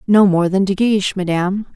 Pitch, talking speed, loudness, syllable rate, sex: 190 Hz, 205 wpm, -16 LUFS, 5.8 syllables/s, female